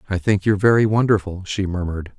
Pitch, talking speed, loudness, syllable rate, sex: 100 Hz, 190 wpm, -19 LUFS, 6.6 syllables/s, male